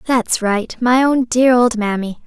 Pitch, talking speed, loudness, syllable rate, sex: 235 Hz, 185 wpm, -15 LUFS, 3.9 syllables/s, female